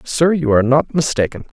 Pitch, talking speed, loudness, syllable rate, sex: 145 Hz, 190 wpm, -16 LUFS, 5.8 syllables/s, male